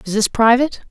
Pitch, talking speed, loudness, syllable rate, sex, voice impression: 235 Hz, 200 wpm, -15 LUFS, 6.7 syllables/s, female, very feminine, adult-like, slightly middle-aged, very thin, slightly tensed, slightly weak, bright, hard, clear, fluent, slightly raspy, cute, intellectual, refreshing, very sincere, very calm, very friendly, very reassuring, slightly unique, very elegant, sweet, slightly lively, kind, slightly sharp